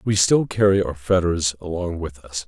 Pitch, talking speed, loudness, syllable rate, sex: 90 Hz, 195 wpm, -21 LUFS, 4.7 syllables/s, male